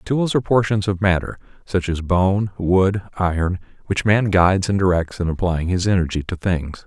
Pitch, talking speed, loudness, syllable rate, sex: 95 Hz, 185 wpm, -19 LUFS, 5.0 syllables/s, male